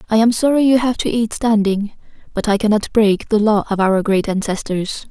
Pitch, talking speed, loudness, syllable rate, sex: 215 Hz, 210 wpm, -16 LUFS, 5.1 syllables/s, female